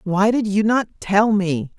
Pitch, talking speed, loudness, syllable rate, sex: 200 Hz, 200 wpm, -18 LUFS, 3.9 syllables/s, female